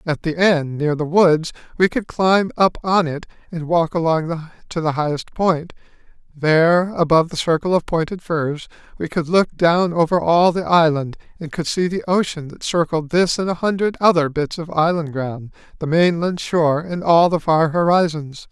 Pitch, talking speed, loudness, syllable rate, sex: 165 Hz, 190 wpm, -18 LUFS, 4.7 syllables/s, male